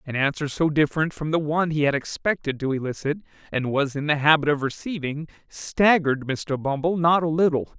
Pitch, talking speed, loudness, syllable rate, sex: 150 Hz, 195 wpm, -23 LUFS, 5.6 syllables/s, male